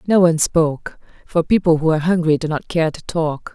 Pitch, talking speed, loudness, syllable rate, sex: 165 Hz, 220 wpm, -18 LUFS, 5.7 syllables/s, female